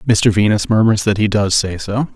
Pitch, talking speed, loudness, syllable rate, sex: 105 Hz, 225 wpm, -15 LUFS, 1.5 syllables/s, male